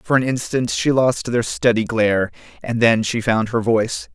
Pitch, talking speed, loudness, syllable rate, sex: 115 Hz, 205 wpm, -19 LUFS, 4.8 syllables/s, male